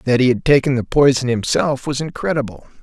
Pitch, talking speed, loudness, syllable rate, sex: 130 Hz, 190 wpm, -17 LUFS, 5.6 syllables/s, male